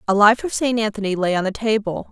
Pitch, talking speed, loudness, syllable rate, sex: 210 Hz, 255 wpm, -19 LUFS, 6.2 syllables/s, female